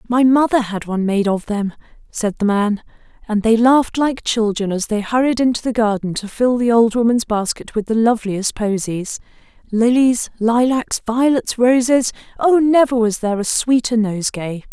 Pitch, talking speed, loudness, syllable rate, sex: 230 Hz, 165 wpm, -17 LUFS, 4.9 syllables/s, female